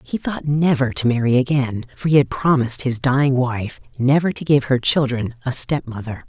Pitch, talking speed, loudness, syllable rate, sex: 130 Hz, 190 wpm, -19 LUFS, 5.2 syllables/s, female